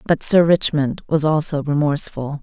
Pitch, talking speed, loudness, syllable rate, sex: 150 Hz, 150 wpm, -18 LUFS, 4.8 syllables/s, female